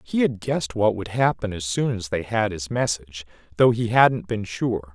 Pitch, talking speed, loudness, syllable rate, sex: 105 Hz, 220 wpm, -23 LUFS, 4.9 syllables/s, male